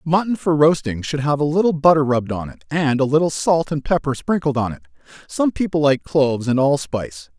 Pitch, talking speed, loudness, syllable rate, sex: 145 Hz, 205 wpm, -19 LUFS, 5.7 syllables/s, male